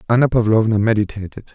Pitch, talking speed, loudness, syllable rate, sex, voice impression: 110 Hz, 115 wpm, -16 LUFS, 6.8 syllables/s, male, masculine, adult-like, tensed, slightly powerful, bright, clear, cool, intellectual, calm, friendly, reassuring, wild, lively, slightly kind